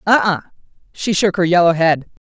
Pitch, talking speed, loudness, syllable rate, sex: 180 Hz, 185 wpm, -16 LUFS, 5.6 syllables/s, female